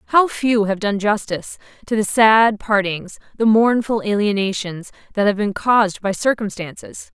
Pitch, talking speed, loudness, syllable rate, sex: 210 Hz, 150 wpm, -18 LUFS, 4.7 syllables/s, female